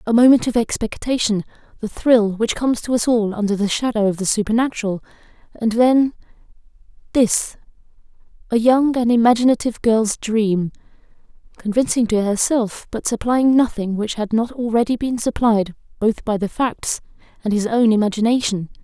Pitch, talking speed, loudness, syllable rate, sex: 225 Hz, 145 wpm, -18 LUFS, 5.2 syllables/s, female